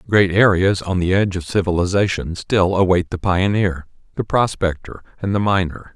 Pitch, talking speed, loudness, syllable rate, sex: 95 Hz, 160 wpm, -18 LUFS, 5.1 syllables/s, male